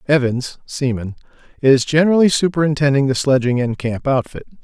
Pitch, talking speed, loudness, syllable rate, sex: 140 Hz, 130 wpm, -17 LUFS, 5.9 syllables/s, male